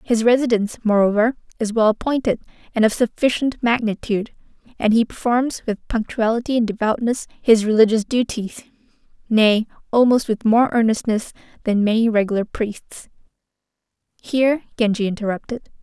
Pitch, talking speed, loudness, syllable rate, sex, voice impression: 225 Hz, 120 wpm, -19 LUFS, 5.3 syllables/s, female, feminine, slightly young, tensed, bright, slightly soft, clear, slightly raspy, intellectual, calm, friendly, reassuring, elegant, lively, slightly kind